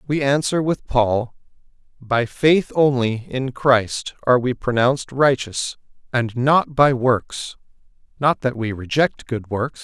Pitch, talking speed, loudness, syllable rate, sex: 130 Hz, 140 wpm, -20 LUFS, 3.8 syllables/s, male